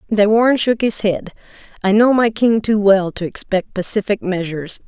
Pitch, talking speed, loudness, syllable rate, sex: 210 Hz, 185 wpm, -16 LUFS, 5.4 syllables/s, female